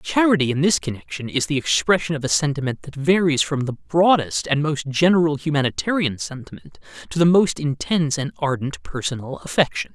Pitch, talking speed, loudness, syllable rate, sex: 150 Hz, 170 wpm, -20 LUFS, 5.6 syllables/s, male